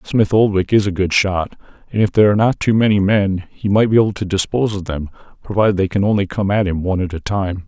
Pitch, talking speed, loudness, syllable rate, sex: 100 Hz, 260 wpm, -17 LUFS, 6.4 syllables/s, male